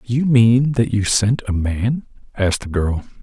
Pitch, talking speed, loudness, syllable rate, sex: 110 Hz, 185 wpm, -18 LUFS, 4.1 syllables/s, male